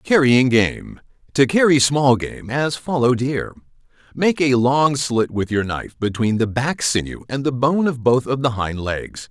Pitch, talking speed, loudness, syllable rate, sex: 130 Hz, 175 wpm, -19 LUFS, 4.4 syllables/s, male